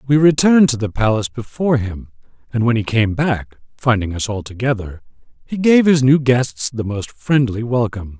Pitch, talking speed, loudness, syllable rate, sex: 120 Hz, 185 wpm, -17 LUFS, 5.3 syllables/s, male